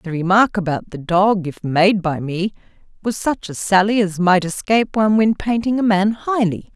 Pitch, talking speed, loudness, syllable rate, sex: 195 Hz, 195 wpm, -18 LUFS, 4.9 syllables/s, female